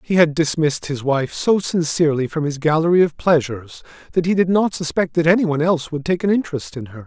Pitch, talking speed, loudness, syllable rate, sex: 155 Hz, 220 wpm, -18 LUFS, 6.2 syllables/s, male